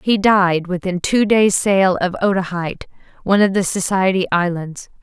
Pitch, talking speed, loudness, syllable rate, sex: 190 Hz, 155 wpm, -17 LUFS, 4.8 syllables/s, female